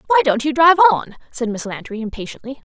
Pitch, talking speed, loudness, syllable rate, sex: 270 Hz, 200 wpm, -17 LUFS, 6.1 syllables/s, female